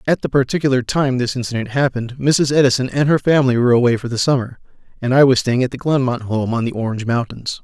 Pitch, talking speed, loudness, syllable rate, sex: 125 Hz, 230 wpm, -17 LUFS, 6.7 syllables/s, male